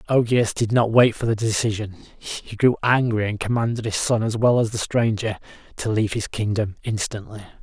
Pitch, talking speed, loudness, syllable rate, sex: 110 Hz, 190 wpm, -21 LUFS, 5.3 syllables/s, male